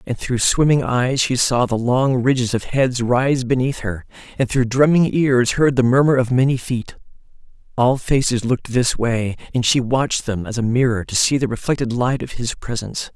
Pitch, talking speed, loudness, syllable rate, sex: 125 Hz, 200 wpm, -18 LUFS, 5.0 syllables/s, male